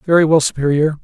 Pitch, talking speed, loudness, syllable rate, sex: 155 Hz, 175 wpm, -14 LUFS, 6.5 syllables/s, male